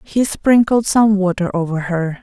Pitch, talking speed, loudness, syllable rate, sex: 195 Hz, 160 wpm, -16 LUFS, 4.2 syllables/s, female